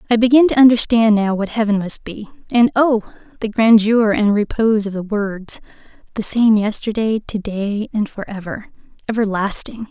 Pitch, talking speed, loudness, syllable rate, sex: 215 Hz, 150 wpm, -16 LUFS, 4.9 syllables/s, female